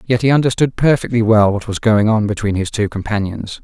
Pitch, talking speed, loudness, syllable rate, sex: 110 Hz, 215 wpm, -16 LUFS, 5.7 syllables/s, male